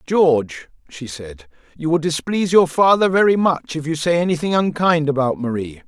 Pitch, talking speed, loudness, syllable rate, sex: 155 Hz, 175 wpm, -17 LUFS, 5.2 syllables/s, male